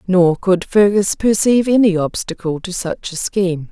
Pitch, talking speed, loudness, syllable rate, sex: 190 Hz, 160 wpm, -16 LUFS, 4.8 syllables/s, female